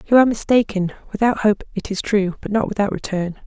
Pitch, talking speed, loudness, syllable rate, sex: 205 Hz, 190 wpm, -20 LUFS, 6.2 syllables/s, female